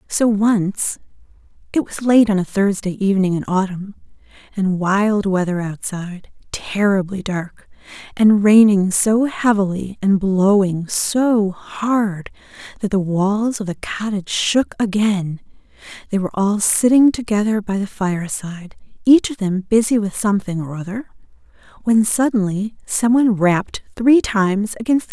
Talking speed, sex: 140 wpm, female